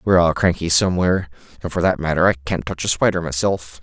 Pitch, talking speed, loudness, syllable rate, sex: 85 Hz, 220 wpm, -19 LUFS, 6.5 syllables/s, male